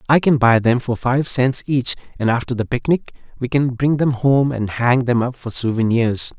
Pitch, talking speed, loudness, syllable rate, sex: 125 Hz, 215 wpm, -18 LUFS, 4.8 syllables/s, male